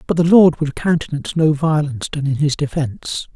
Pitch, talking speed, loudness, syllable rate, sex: 150 Hz, 195 wpm, -17 LUFS, 5.7 syllables/s, male